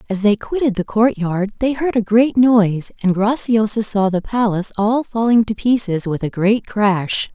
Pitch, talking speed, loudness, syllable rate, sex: 215 Hz, 190 wpm, -17 LUFS, 4.6 syllables/s, female